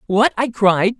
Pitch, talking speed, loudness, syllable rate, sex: 215 Hz, 180 wpm, -16 LUFS, 3.9 syllables/s, male